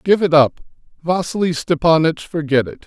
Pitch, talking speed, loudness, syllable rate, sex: 160 Hz, 145 wpm, -17 LUFS, 5.0 syllables/s, male